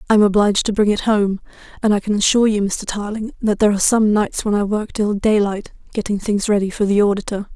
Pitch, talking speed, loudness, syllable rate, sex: 205 Hz, 240 wpm, -18 LUFS, 6.3 syllables/s, female